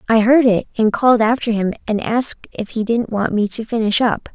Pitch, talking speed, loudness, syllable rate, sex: 225 Hz, 235 wpm, -17 LUFS, 5.5 syllables/s, female